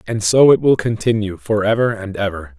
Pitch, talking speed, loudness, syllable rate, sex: 110 Hz, 210 wpm, -16 LUFS, 5.3 syllables/s, male